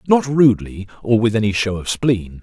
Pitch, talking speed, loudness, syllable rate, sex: 115 Hz, 200 wpm, -17 LUFS, 5.2 syllables/s, male